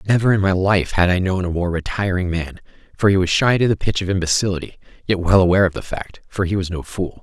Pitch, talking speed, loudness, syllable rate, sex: 95 Hz, 255 wpm, -19 LUFS, 6.0 syllables/s, male